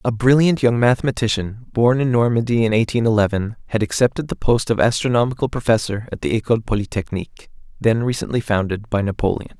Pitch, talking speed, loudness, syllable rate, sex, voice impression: 115 Hz, 165 wpm, -19 LUFS, 6.1 syllables/s, male, masculine, adult-like, fluent, cool, intellectual, elegant, slightly sweet